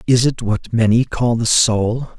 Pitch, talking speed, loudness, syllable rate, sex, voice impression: 115 Hz, 190 wpm, -16 LUFS, 4.0 syllables/s, male, very masculine, very adult-like, very middle-aged, very thick, tensed, very powerful, dark, slightly soft, muffled, fluent, slightly raspy, cool, intellectual, sincere, very calm, very mature, friendly, very reassuring, very wild, slightly lively, slightly strict, slightly intense